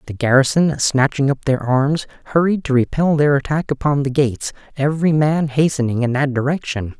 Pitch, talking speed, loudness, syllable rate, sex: 140 Hz, 170 wpm, -17 LUFS, 5.4 syllables/s, male